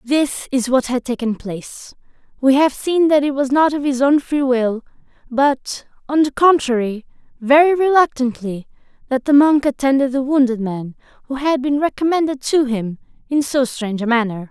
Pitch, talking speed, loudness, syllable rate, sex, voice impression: 265 Hz, 175 wpm, -17 LUFS, 4.9 syllables/s, female, gender-neutral, young, tensed, powerful, bright, clear, fluent, intellectual, slightly friendly, unique, lively, intense, sharp